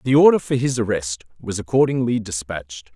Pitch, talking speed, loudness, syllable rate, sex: 110 Hz, 160 wpm, -20 LUFS, 5.6 syllables/s, male